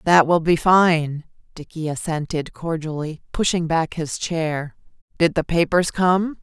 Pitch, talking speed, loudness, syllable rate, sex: 165 Hz, 140 wpm, -20 LUFS, 4.0 syllables/s, female